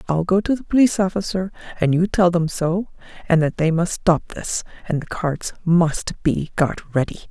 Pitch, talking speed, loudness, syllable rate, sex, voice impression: 175 Hz, 195 wpm, -20 LUFS, 4.9 syllables/s, female, very feminine, very adult-like, middle-aged, thin, slightly tensed, slightly weak, bright, soft, clear, fluent, cute, very intellectual, very refreshing, sincere, very calm, friendly, reassuring, unique, very elegant, sweet, slightly lively, kind, slightly modest, light